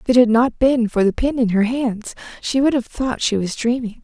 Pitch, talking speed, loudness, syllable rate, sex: 240 Hz, 265 wpm, -18 LUFS, 5.3 syllables/s, female